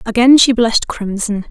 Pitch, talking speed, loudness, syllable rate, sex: 225 Hz, 160 wpm, -13 LUFS, 5.2 syllables/s, female